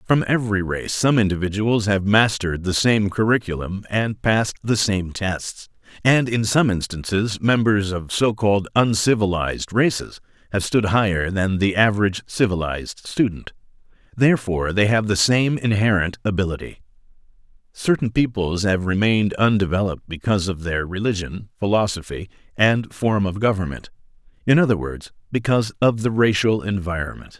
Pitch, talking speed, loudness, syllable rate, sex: 105 Hz, 135 wpm, -20 LUFS, 5.2 syllables/s, male